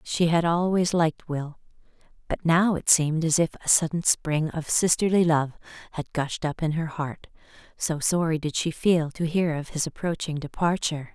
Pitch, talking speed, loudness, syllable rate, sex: 160 Hz, 185 wpm, -24 LUFS, 4.9 syllables/s, female